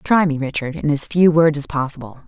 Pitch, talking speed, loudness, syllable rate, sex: 150 Hz, 240 wpm, -18 LUFS, 5.6 syllables/s, female